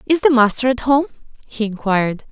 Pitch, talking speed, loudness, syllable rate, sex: 245 Hz, 180 wpm, -17 LUFS, 5.7 syllables/s, female